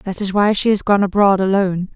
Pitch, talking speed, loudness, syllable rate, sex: 195 Hz, 245 wpm, -16 LUFS, 5.8 syllables/s, female